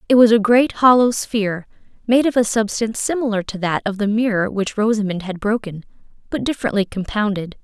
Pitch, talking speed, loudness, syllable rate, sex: 215 Hz, 180 wpm, -18 LUFS, 5.8 syllables/s, female